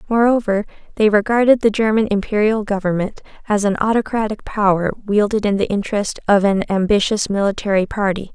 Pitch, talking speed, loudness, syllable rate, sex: 205 Hz, 145 wpm, -17 LUFS, 5.7 syllables/s, female